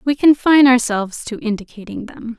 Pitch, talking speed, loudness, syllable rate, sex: 240 Hz, 150 wpm, -15 LUFS, 5.7 syllables/s, female